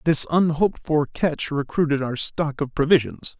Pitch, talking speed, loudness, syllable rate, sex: 150 Hz, 160 wpm, -22 LUFS, 4.6 syllables/s, male